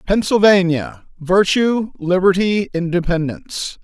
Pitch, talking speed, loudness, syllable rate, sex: 180 Hz, 45 wpm, -16 LUFS, 4.1 syllables/s, male